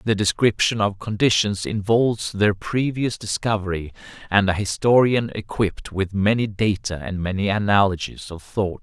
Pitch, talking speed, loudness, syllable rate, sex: 105 Hz, 135 wpm, -21 LUFS, 4.8 syllables/s, male